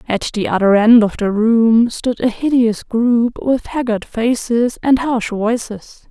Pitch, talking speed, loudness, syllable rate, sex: 230 Hz, 165 wpm, -15 LUFS, 3.8 syllables/s, female